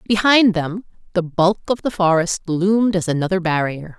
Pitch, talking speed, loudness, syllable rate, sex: 185 Hz, 165 wpm, -18 LUFS, 5.0 syllables/s, female